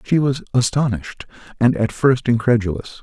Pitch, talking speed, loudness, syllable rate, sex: 120 Hz, 140 wpm, -18 LUFS, 5.4 syllables/s, male